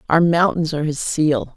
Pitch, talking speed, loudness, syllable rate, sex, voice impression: 155 Hz, 190 wpm, -18 LUFS, 5.1 syllables/s, female, feminine, middle-aged, tensed, powerful, slightly muffled, raspy, calm, slightly mature, slightly reassuring, slightly strict, slightly sharp